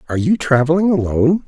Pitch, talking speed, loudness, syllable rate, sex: 150 Hz, 165 wpm, -15 LUFS, 7.0 syllables/s, male